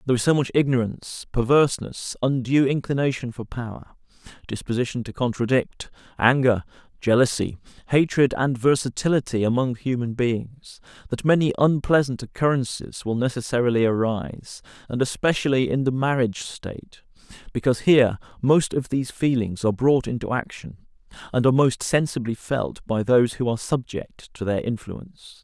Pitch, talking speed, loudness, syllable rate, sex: 125 Hz, 135 wpm, -22 LUFS, 5.4 syllables/s, male